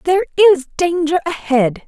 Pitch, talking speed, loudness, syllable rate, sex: 320 Hz, 130 wpm, -15 LUFS, 5.5 syllables/s, female